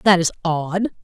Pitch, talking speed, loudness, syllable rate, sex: 180 Hz, 175 wpm, -20 LUFS, 3.9 syllables/s, female